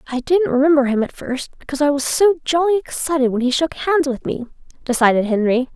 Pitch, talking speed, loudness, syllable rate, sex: 280 Hz, 210 wpm, -18 LUFS, 6.1 syllables/s, female